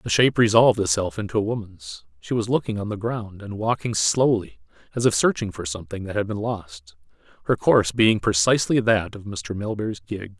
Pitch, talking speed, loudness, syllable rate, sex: 105 Hz, 195 wpm, -22 LUFS, 5.6 syllables/s, male